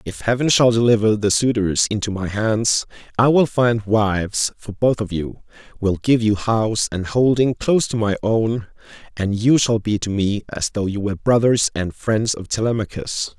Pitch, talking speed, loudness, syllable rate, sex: 110 Hz, 190 wpm, -19 LUFS, 4.7 syllables/s, male